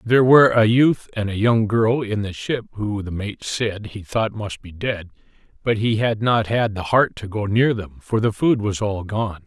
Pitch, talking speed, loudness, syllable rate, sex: 110 Hz, 235 wpm, -20 LUFS, 4.6 syllables/s, male